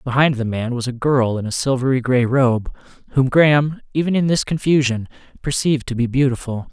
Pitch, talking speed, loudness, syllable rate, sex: 130 Hz, 190 wpm, -18 LUFS, 5.6 syllables/s, male